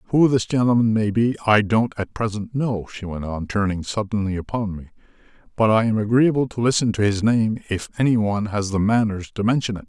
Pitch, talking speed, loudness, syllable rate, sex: 110 Hz, 215 wpm, -21 LUFS, 5.7 syllables/s, male